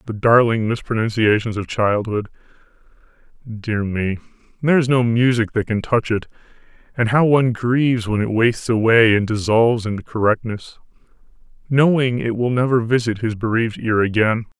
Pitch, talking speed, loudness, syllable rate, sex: 115 Hz, 140 wpm, -18 LUFS, 5.2 syllables/s, male